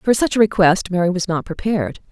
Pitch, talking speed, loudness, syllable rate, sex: 190 Hz, 225 wpm, -18 LUFS, 6.0 syllables/s, female